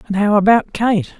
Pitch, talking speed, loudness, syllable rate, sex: 210 Hz, 200 wpm, -15 LUFS, 4.9 syllables/s, female